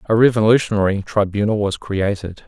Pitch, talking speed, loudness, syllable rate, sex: 105 Hz, 120 wpm, -18 LUFS, 5.5 syllables/s, male